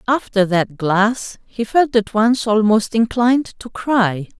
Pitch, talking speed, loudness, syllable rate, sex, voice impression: 220 Hz, 150 wpm, -17 LUFS, 3.7 syllables/s, female, feminine, middle-aged, tensed, powerful, clear, slightly friendly, lively, strict, slightly intense, sharp